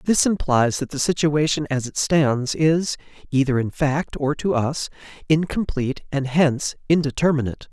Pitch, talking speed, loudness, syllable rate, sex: 145 Hz, 150 wpm, -21 LUFS, 4.8 syllables/s, male